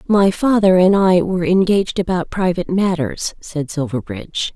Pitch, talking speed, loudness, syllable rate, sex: 180 Hz, 145 wpm, -17 LUFS, 5.1 syllables/s, female